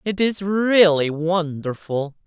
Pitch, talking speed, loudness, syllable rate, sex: 175 Hz, 105 wpm, -20 LUFS, 3.4 syllables/s, male